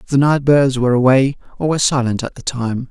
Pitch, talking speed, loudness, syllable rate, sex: 130 Hz, 225 wpm, -16 LUFS, 6.0 syllables/s, male